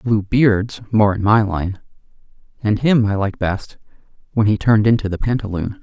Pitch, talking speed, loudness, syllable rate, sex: 105 Hz, 175 wpm, -18 LUFS, 4.8 syllables/s, male